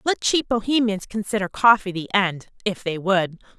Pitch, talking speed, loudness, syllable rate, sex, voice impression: 205 Hz, 165 wpm, -21 LUFS, 4.9 syllables/s, female, feminine, adult-like, clear, slightly sincere, slightly sharp